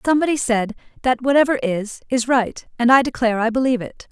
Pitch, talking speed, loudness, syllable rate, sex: 245 Hz, 190 wpm, -19 LUFS, 6.2 syllables/s, female